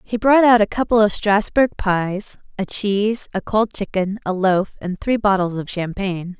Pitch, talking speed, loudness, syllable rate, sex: 200 Hz, 190 wpm, -19 LUFS, 4.6 syllables/s, female